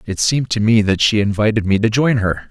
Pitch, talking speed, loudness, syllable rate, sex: 110 Hz, 265 wpm, -16 LUFS, 5.9 syllables/s, male